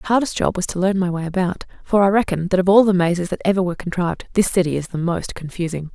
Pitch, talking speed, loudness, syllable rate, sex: 185 Hz, 270 wpm, -19 LUFS, 6.7 syllables/s, female